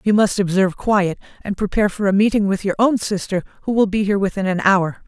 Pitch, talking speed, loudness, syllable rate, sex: 200 Hz, 235 wpm, -18 LUFS, 6.3 syllables/s, female